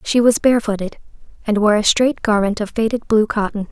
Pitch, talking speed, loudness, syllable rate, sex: 220 Hz, 195 wpm, -17 LUFS, 5.7 syllables/s, female